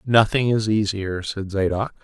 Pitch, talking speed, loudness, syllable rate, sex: 105 Hz, 150 wpm, -21 LUFS, 4.3 syllables/s, male